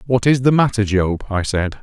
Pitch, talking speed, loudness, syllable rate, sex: 110 Hz, 230 wpm, -17 LUFS, 4.9 syllables/s, male